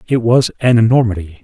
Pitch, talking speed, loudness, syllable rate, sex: 115 Hz, 170 wpm, -13 LUFS, 5.9 syllables/s, male